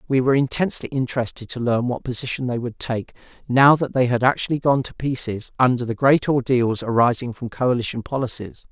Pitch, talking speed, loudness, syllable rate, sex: 125 Hz, 185 wpm, -21 LUFS, 6.0 syllables/s, male